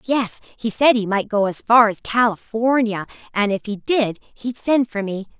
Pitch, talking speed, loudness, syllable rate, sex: 225 Hz, 200 wpm, -19 LUFS, 4.5 syllables/s, female